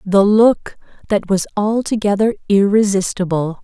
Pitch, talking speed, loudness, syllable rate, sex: 205 Hz, 100 wpm, -16 LUFS, 4.4 syllables/s, female